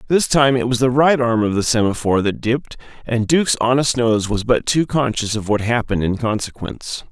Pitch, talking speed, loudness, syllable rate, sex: 120 Hz, 200 wpm, -18 LUFS, 5.6 syllables/s, male